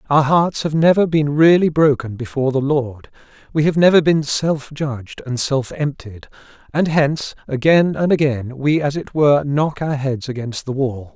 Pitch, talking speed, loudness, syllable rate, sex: 145 Hz, 185 wpm, -17 LUFS, 4.8 syllables/s, male